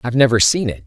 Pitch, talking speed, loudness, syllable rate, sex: 120 Hz, 280 wpm, -15 LUFS, 7.8 syllables/s, male